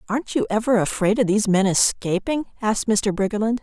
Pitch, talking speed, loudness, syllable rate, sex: 215 Hz, 180 wpm, -21 LUFS, 6.1 syllables/s, female